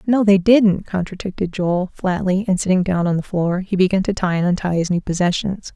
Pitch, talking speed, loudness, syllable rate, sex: 185 Hz, 220 wpm, -18 LUFS, 5.4 syllables/s, female